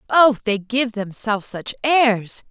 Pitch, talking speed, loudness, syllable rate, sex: 230 Hz, 145 wpm, -19 LUFS, 3.8 syllables/s, female